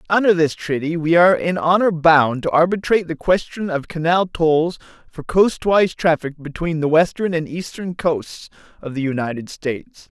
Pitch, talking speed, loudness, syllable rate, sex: 165 Hz, 165 wpm, -18 LUFS, 5.0 syllables/s, male